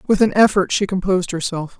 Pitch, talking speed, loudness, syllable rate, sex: 185 Hz, 200 wpm, -17 LUFS, 6.3 syllables/s, female